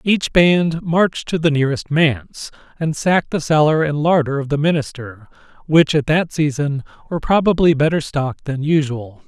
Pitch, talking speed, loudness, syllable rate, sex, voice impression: 155 Hz, 170 wpm, -17 LUFS, 5.1 syllables/s, male, masculine, adult-like, tensed, bright, clear, slightly halting, intellectual, calm, friendly, reassuring, wild, lively, slightly strict, slightly sharp